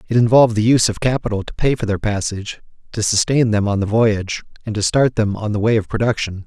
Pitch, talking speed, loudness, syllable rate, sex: 110 Hz, 240 wpm, -17 LUFS, 6.3 syllables/s, male